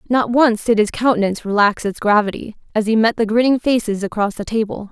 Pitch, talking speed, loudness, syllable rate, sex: 220 Hz, 210 wpm, -17 LUFS, 6.0 syllables/s, female